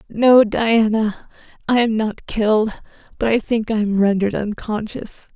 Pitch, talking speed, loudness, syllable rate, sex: 215 Hz, 145 wpm, -18 LUFS, 4.4 syllables/s, female